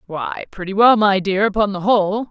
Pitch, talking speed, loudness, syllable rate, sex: 200 Hz, 210 wpm, -17 LUFS, 5.3 syllables/s, female